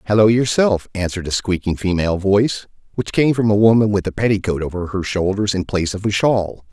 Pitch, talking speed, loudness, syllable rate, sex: 100 Hz, 205 wpm, -18 LUFS, 6.0 syllables/s, male